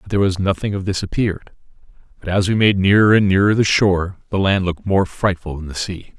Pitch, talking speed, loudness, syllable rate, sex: 95 Hz, 235 wpm, -17 LUFS, 6.2 syllables/s, male